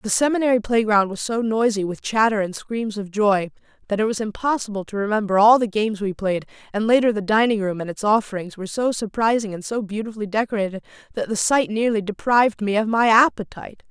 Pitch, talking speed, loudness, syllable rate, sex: 215 Hz, 205 wpm, -21 LUFS, 6.1 syllables/s, female